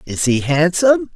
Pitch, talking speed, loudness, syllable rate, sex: 170 Hz, 155 wpm, -15 LUFS, 5.0 syllables/s, male